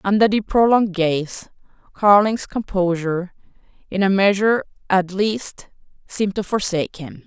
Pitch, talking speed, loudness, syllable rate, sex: 195 Hz, 125 wpm, -19 LUFS, 4.8 syllables/s, female